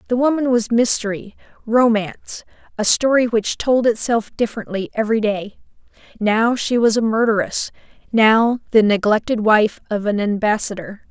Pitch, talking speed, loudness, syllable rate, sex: 220 Hz, 135 wpm, -18 LUFS, 4.9 syllables/s, female